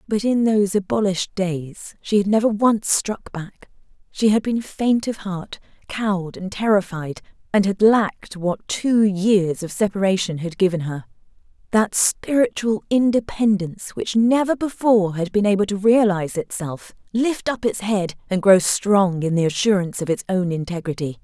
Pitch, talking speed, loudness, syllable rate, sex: 200 Hz, 160 wpm, -20 LUFS, 4.7 syllables/s, female